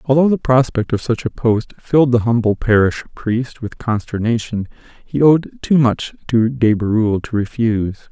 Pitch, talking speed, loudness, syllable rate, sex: 115 Hz, 170 wpm, -17 LUFS, 4.7 syllables/s, male